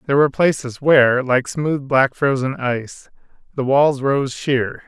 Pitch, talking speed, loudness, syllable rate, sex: 135 Hz, 160 wpm, -18 LUFS, 4.5 syllables/s, male